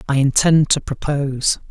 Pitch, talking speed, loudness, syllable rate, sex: 140 Hz, 140 wpm, -17 LUFS, 4.8 syllables/s, male